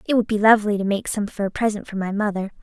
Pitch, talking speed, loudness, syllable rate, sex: 210 Hz, 295 wpm, -21 LUFS, 6.9 syllables/s, female